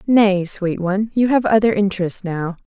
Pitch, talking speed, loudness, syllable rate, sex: 200 Hz, 180 wpm, -18 LUFS, 5.0 syllables/s, female